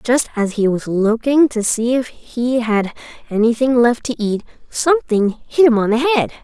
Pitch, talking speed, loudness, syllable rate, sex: 240 Hz, 185 wpm, -16 LUFS, 4.6 syllables/s, female